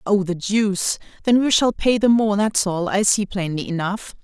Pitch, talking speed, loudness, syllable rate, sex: 205 Hz, 210 wpm, -19 LUFS, 4.7 syllables/s, female